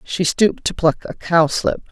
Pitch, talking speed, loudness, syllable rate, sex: 170 Hz, 190 wpm, -18 LUFS, 4.8 syllables/s, female